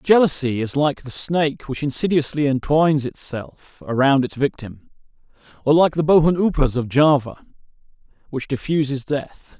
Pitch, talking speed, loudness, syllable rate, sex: 140 Hz, 140 wpm, -19 LUFS, 4.8 syllables/s, male